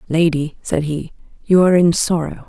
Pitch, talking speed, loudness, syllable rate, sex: 165 Hz, 170 wpm, -17 LUFS, 5.1 syllables/s, female